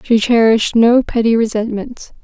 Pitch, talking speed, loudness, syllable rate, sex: 230 Hz, 135 wpm, -13 LUFS, 5.0 syllables/s, female